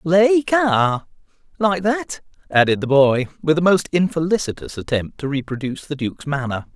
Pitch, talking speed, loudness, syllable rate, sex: 160 Hz, 135 wpm, -19 LUFS, 5.4 syllables/s, male